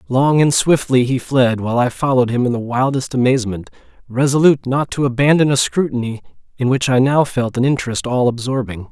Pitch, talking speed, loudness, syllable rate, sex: 130 Hz, 190 wpm, -16 LUFS, 5.9 syllables/s, male